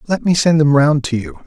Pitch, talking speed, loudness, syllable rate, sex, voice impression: 145 Hz, 285 wpm, -14 LUFS, 5.6 syllables/s, male, masculine, middle-aged, thick, powerful, slightly bright, slightly cool, sincere, calm, mature, friendly, reassuring, wild, lively, slightly strict